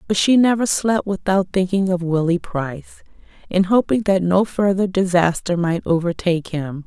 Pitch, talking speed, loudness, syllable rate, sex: 185 Hz, 155 wpm, -19 LUFS, 5.0 syllables/s, female